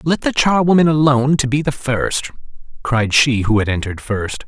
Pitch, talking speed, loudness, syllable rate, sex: 135 Hz, 190 wpm, -16 LUFS, 5.2 syllables/s, male